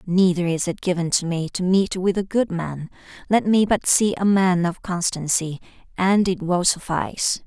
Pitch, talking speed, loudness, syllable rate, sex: 180 Hz, 195 wpm, -21 LUFS, 4.6 syllables/s, female